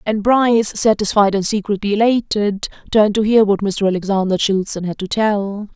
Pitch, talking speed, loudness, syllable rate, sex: 205 Hz, 165 wpm, -16 LUFS, 5.4 syllables/s, female